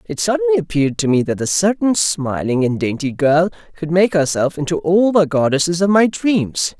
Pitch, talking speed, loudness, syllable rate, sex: 175 Hz, 195 wpm, -16 LUFS, 5.2 syllables/s, male